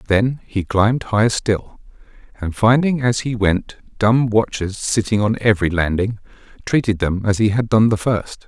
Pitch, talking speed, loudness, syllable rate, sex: 110 Hz, 170 wpm, -18 LUFS, 4.5 syllables/s, male